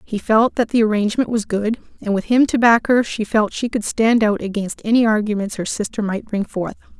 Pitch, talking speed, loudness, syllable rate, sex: 215 Hz, 230 wpm, -18 LUFS, 5.4 syllables/s, female